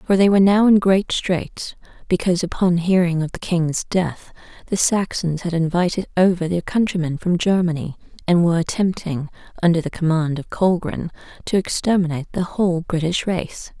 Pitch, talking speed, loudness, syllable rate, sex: 175 Hz, 160 wpm, -19 LUFS, 5.3 syllables/s, female